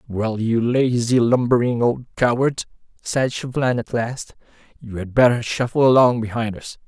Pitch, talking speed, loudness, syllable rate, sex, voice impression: 120 Hz, 150 wpm, -19 LUFS, 4.7 syllables/s, male, masculine, slightly gender-neutral, adult-like, tensed, slightly bright, clear, intellectual, calm, friendly, unique, slightly lively, kind